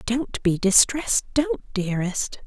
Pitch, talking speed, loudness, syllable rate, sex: 230 Hz, 120 wpm, -22 LUFS, 4.1 syllables/s, female